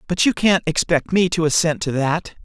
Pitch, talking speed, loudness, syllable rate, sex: 170 Hz, 220 wpm, -18 LUFS, 5.0 syllables/s, male